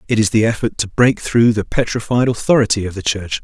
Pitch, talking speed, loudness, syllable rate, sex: 110 Hz, 225 wpm, -16 LUFS, 5.9 syllables/s, male